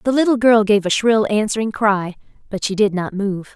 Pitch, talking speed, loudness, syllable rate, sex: 210 Hz, 220 wpm, -17 LUFS, 5.1 syllables/s, female